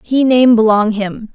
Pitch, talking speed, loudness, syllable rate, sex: 225 Hz, 180 wpm, -12 LUFS, 4.0 syllables/s, female